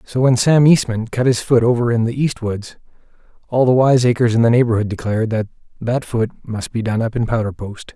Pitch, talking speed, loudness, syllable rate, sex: 120 Hz, 220 wpm, -17 LUFS, 5.6 syllables/s, male